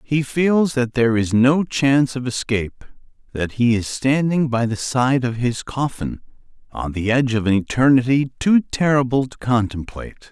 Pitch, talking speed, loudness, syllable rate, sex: 125 Hz, 165 wpm, -19 LUFS, 4.9 syllables/s, male